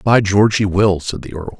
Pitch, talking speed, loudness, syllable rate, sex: 100 Hz, 265 wpm, -15 LUFS, 5.5 syllables/s, male